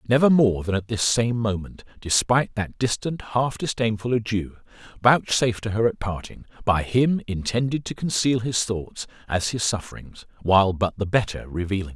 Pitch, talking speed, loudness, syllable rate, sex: 110 Hz, 170 wpm, -23 LUFS, 5.1 syllables/s, male